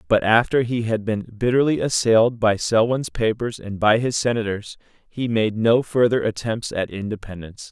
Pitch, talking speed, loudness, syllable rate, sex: 115 Hz, 165 wpm, -20 LUFS, 5.0 syllables/s, male